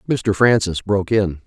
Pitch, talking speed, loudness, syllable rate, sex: 100 Hz, 165 wpm, -18 LUFS, 4.8 syllables/s, male